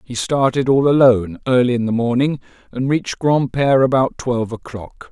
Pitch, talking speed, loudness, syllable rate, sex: 125 Hz, 165 wpm, -17 LUFS, 5.5 syllables/s, male